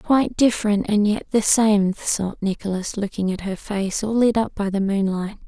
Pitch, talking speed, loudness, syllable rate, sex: 205 Hz, 195 wpm, -21 LUFS, 4.7 syllables/s, female